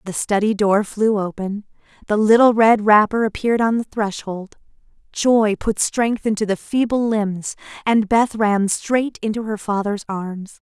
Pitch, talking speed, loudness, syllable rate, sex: 215 Hz, 155 wpm, -18 LUFS, 4.3 syllables/s, female